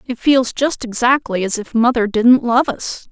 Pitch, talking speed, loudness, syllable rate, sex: 240 Hz, 195 wpm, -16 LUFS, 4.4 syllables/s, female